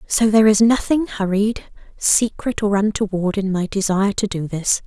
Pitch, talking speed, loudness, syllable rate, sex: 205 Hz, 175 wpm, -18 LUFS, 4.9 syllables/s, female